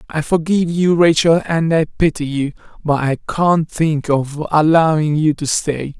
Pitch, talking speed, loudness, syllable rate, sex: 155 Hz, 170 wpm, -16 LUFS, 4.2 syllables/s, male